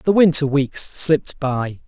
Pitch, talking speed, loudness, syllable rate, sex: 145 Hz, 160 wpm, -18 LUFS, 3.9 syllables/s, male